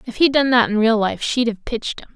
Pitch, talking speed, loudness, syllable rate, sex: 235 Hz, 305 wpm, -18 LUFS, 6.0 syllables/s, female